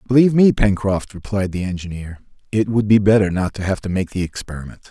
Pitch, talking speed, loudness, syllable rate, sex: 100 Hz, 210 wpm, -18 LUFS, 6.2 syllables/s, male